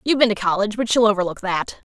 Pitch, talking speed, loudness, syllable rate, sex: 210 Hz, 250 wpm, -19 LUFS, 7.4 syllables/s, female